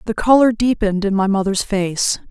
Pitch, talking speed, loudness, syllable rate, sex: 205 Hz, 180 wpm, -16 LUFS, 5.2 syllables/s, female